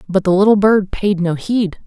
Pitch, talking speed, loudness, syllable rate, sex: 195 Hz, 225 wpm, -15 LUFS, 5.0 syllables/s, female